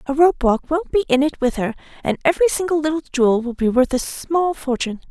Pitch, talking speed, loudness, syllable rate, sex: 285 Hz, 235 wpm, -19 LUFS, 6.3 syllables/s, female